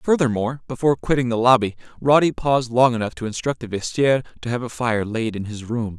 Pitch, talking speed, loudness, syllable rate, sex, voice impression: 120 Hz, 210 wpm, -21 LUFS, 6.3 syllables/s, male, masculine, adult-like, tensed, slightly powerful, fluent, refreshing, lively